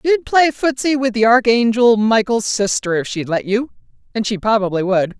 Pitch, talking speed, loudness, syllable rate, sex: 225 Hz, 185 wpm, -16 LUFS, 5.0 syllables/s, female